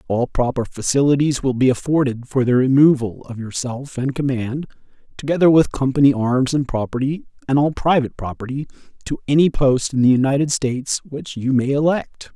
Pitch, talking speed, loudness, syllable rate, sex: 135 Hz, 165 wpm, -18 LUFS, 5.4 syllables/s, male